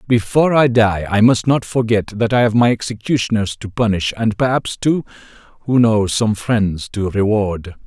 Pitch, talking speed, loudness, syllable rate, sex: 110 Hz, 175 wpm, -16 LUFS, 4.7 syllables/s, male